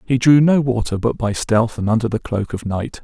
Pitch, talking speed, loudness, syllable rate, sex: 115 Hz, 255 wpm, -18 LUFS, 5.2 syllables/s, male